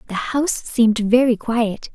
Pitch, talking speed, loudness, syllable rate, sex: 230 Hz, 155 wpm, -18 LUFS, 4.6 syllables/s, female